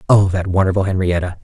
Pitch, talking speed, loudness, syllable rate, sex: 95 Hz, 170 wpm, -16 LUFS, 6.5 syllables/s, male